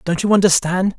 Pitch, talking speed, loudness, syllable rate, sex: 185 Hz, 185 wpm, -15 LUFS, 5.8 syllables/s, male